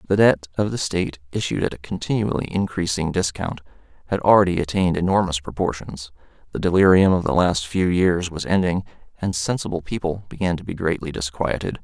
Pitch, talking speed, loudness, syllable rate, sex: 90 Hz, 165 wpm, -21 LUFS, 5.9 syllables/s, male